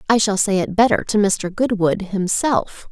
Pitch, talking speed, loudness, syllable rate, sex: 205 Hz, 185 wpm, -18 LUFS, 4.4 syllables/s, female